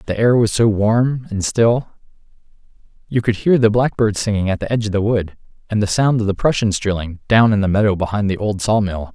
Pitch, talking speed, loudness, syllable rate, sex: 105 Hz, 215 wpm, -17 LUFS, 5.7 syllables/s, male